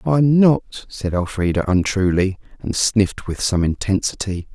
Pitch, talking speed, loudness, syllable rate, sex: 100 Hz, 130 wpm, -19 LUFS, 4.4 syllables/s, male